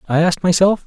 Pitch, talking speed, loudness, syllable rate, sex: 175 Hz, 210 wpm, -15 LUFS, 7.3 syllables/s, male